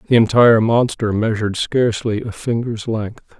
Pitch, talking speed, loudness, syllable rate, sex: 115 Hz, 140 wpm, -17 LUFS, 5.0 syllables/s, male